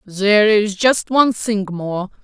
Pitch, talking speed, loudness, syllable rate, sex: 210 Hz, 160 wpm, -16 LUFS, 4.1 syllables/s, female